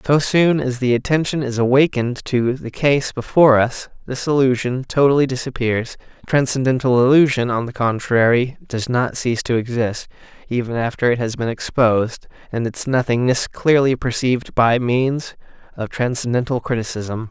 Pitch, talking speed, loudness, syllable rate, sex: 125 Hz, 145 wpm, -18 LUFS, 5.0 syllables/s, male